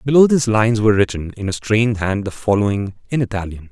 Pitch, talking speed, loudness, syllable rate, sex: 110 Hz, 210 wpm, -17 LUFS, 6.6 syllables/s, male